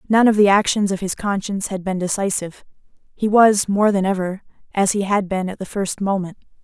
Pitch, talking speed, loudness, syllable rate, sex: 195 Hz, 210 wpm, -19 LUFS, 5.7 syllables/s, female